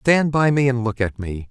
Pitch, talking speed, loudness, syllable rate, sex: 125 Hz, 280 wpm, -19 LUFS, 4.8 syllables/s, male